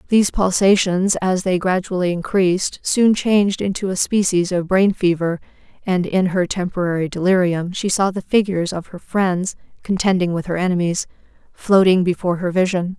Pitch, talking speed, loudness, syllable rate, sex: 185 Hz, 155 wpm, -18 LUFS, 5.2 syllables/s, female